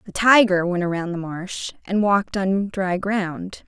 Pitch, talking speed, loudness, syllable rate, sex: 190 Hz, 180 wpm, -21 LUFS, 4.1 syllables/s, female